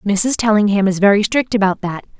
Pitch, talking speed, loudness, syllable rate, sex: 205 Hz, 190 wpm, -15 LUFS, 5.3 syllables/s, female